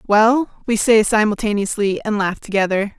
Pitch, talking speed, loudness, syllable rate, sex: 210 Hz, 140 wpm, -17 LUFS, 5.0 syllables/s, female